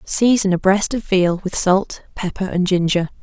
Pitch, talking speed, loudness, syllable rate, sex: 190 Hz, 185 wpm, -18 LUFS, 4.5 syllables/s, female